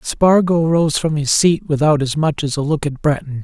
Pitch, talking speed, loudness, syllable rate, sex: 155 Hz, 225 wpm, -16 LUFS, 4.8 syllables/s, male